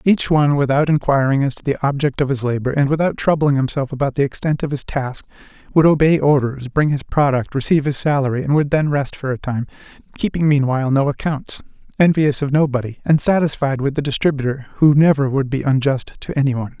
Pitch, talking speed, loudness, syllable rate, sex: 140 Hz, 205 wpm, -18 LUFS, 6.0 syllables/s, male